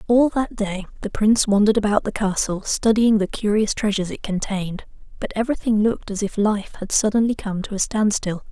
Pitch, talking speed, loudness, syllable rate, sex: 210 Hz, 190 wpm, -21 LUFS, 5.8 syllables/s, female